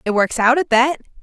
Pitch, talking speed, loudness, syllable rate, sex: 250 Hz, 245 wpm, -16 LUFS, 5.4 syllables/s, female